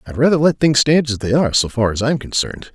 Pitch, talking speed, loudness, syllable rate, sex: 130 Hz, 285 wpm, -16 LUFS, 6.5 syllables/s, male